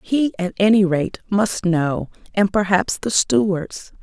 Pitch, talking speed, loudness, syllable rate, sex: 190 Hz, 150 wpm, -19 LUFS, 3.8 syllables/s, female